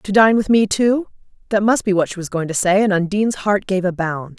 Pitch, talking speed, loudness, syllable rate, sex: 200 Hz, 275 wpm, -17 LUFS, 5.6 syllables/s, female